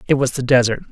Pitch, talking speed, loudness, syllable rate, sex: 130 Hz, 260 wpm, -16 LUFS, 7.8 syllables/s, male